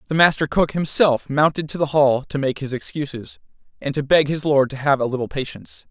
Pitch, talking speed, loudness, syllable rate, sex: 145 Hz, 225 wpm, -20 LUFS, 5.7 syllables/s, male